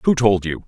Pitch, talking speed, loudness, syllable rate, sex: 110 Hz, 265 wpm, -18 LUFS, 5.5 syllables/s, male